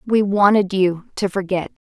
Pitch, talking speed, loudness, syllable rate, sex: 195 Hz, 160 wpm, -18 LUFS, 4.5 syllables/s, female